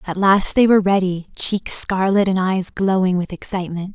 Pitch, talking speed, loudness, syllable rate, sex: 190 Hz, 180 wpm, -18 LUFS, 5.2 syllables/s, female